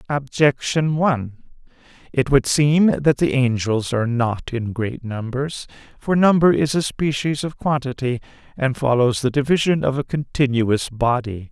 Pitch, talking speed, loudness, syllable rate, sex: 135 Hz, 145 wpm, -20 LUFS, 4.4 syllables/s, male